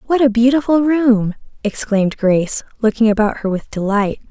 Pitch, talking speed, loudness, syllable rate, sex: 230 Hz, 155 wpm, -16 LUFS, 5.3 syllables/s, female